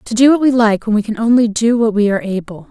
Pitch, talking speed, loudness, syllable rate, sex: 220 Hz, 310 wpm, -14 LUFS, 6.5 syllables/s, female